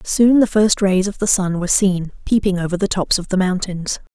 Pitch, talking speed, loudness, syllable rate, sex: 190 Hz, 230 wpm, -17 LUFS, 5.2 syllables/s, female